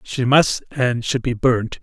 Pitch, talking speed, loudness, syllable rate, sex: 125 Hz, 195 wpm, -18 LUFS, 3.6 syllables/s, male